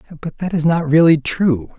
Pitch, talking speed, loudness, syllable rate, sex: 155 Hz, 200 wpm, -16 LUFS, 5.1 syllables/s, male